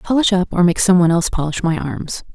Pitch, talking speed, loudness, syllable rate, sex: 175 Hz, 255 wpm, -16 LUFS, 6.4 syllables/s, female